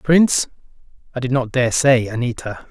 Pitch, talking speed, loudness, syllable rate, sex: 125 Hz, 155 wpm, -18 LUFS, 5.0 syllables/s, male